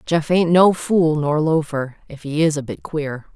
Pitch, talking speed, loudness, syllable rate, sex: 155 Hz, 215 wpm, -18 LUFS, 4.2 syllables/s, female